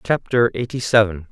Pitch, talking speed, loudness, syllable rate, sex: 115 Hz, 135 wpm, -18 LUFS, 5.1 syllables/s, male